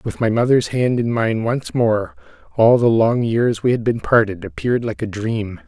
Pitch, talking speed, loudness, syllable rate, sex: 115 Hz, 210 wpm, -18 LUFS, 4.7 syllables/s, male